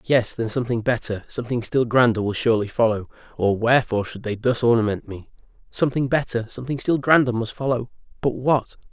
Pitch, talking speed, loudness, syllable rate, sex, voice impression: 120 Hz, 170 wpm, -22 LUFS, 6.1 syllables/s, male, masculine, adult-like, slightly thick, slightly cool, slightly calm, slightly kind